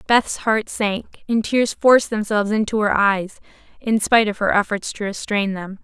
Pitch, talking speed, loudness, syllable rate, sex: 210 Hz, 185 wpm, -19 LUFS, 5.0 syllables/s, female